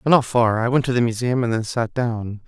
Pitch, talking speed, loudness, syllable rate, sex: 120 Hz, 290 wpm, -20 LUFS, 5.6 syllables/s, male